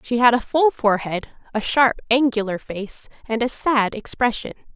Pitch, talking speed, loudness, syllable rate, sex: 235 Hz, 165 wpm, -20 LUFS, 4.7 syllables/s, female